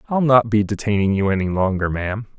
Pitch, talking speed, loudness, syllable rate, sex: 105 Hz, 200 wpm, -19 LUFS, 6.2 syllables/s, male